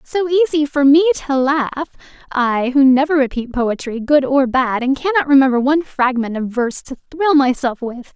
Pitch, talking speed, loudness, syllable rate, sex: 275 Hz, 175 wpm, -16 LUFS, 5.1 syllables/s, female